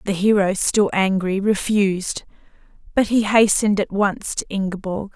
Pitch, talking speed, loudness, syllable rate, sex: 200 Hz, 140 wpm, -19 LUFS, 4.7 syllables/s, female